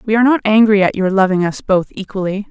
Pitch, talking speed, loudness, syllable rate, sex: 200 Hz, 240 wpm, -14 LUFS, 6.5 syllables/s, female